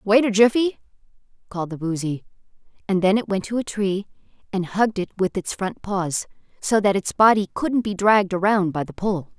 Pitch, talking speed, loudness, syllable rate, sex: 200 Hz, 200 wpm, -21 LUFS, 5.5 syllables/s, female